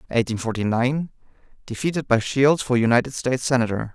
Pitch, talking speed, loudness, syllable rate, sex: 125 Hz, 135 wpm, -21 LUFS, 6.3 syllables/s, male